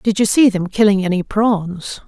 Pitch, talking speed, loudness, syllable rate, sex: 200 Hz, 200 wpm, -16 LUFS, 4.5 syllables/s, female